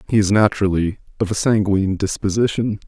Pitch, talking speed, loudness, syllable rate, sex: 100 Hz, 145 wpm, -19 LUFS, 6.1 syllables/s, male